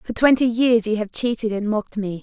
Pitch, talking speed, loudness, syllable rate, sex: 225 Hz, 245 wpm, -20 LUFS, 5.6 syllables/s, female